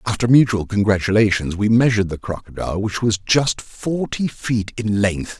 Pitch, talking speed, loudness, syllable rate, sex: 110 Hz, 155 wpm, -19 LUFS, 4.9 syllables/s, male